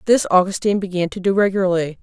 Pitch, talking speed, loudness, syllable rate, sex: 190 Hz, 175 wpm, -18 LUFS, 7.0 syllables/s, female